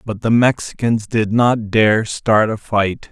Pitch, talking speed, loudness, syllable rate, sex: 110 Hz, 175 wpm, -16 LUFS, 3.7 syllables/s, male